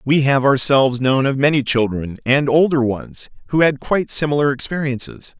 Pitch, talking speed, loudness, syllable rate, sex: 135 Hz, 165 wpm, -17 LUFS, 5.2 syllables/s, male